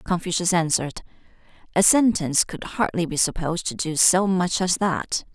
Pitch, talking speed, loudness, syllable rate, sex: 175 Hz, 155 wpm, -21 LUFS, 5.3 syllables/s, female